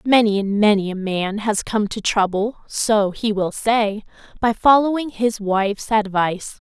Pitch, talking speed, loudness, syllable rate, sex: 210 Hz, 145 wpm, -19 LUFS, 4.3 syllables/s, female